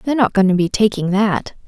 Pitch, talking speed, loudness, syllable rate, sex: 205 Hz, 250 wpm, -16 LUFS, 6.2 syllables/s, female